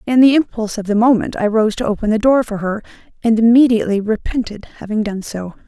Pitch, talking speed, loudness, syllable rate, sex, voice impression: 220 Hz, 210 wpm, -16 LUFS, 6.3 syllables/s, female, feminine, adult-like, tensed, powerful, hard, raspy, calm, reassuring, elegant, slightly strict, slightly sharp